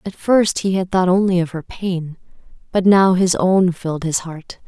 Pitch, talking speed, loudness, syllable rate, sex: 180 Hz, 205 wpm, -17 LUFS, 4.5 syllables/s, female